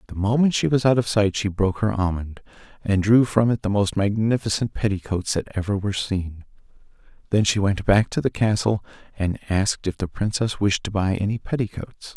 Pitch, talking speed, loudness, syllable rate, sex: 100 Hz, 195 wpm, -22 LUFS, 5.5 syllables/s, male